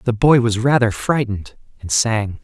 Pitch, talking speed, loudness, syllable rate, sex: 115 Hz, 175 wpm, -17 LUFS, 4.7 syllables/s, male